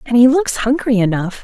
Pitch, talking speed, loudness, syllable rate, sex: 235 Hz, 210 wpm, -14 LUFS, 5.3 syllables/s, female